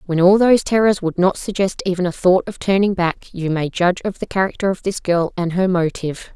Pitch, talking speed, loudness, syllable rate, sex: 185 Hz, 235 wpm, -18 LUFS, 5.8 syllables/s, female